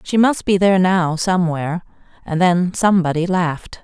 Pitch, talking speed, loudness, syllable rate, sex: 180 Hz, 155 wpm, -17 LUFS, 5.4 syllables/s, female